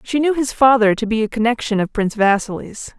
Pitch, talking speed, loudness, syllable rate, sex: 230 Hz, 220 wpm, -17 LUFS, 5.9 syllables/s, female